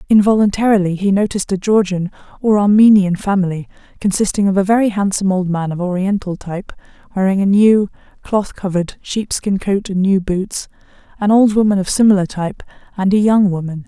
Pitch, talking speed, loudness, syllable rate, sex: 195 Hz, 165 wpm, -15 LUFS, 5.8 syllables/s, female